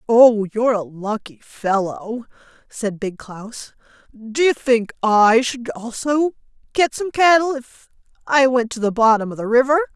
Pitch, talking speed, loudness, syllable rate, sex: 240 Hz, 155 wpm, -18 LUFS, 4.1 syllables/s, female